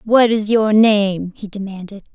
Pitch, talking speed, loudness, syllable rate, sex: 205 Hz, 170 wpm, -15 LUFS, 4.2 syllables/s, female